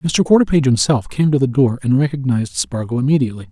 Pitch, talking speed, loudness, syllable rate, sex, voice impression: 135 Hz, 190 wpm, -16 LUFS, 6.7 syllables/s, male, masculine, middle-aged, relaxed, slightly dark, slightly muffled, fluent, slightly raspy, intellectual, slightly mature, unique, slightly strict, modest